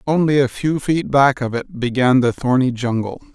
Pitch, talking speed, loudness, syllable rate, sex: 130 Hz, 195 wpm, -17 LUFS, 4.9 syllables/s, male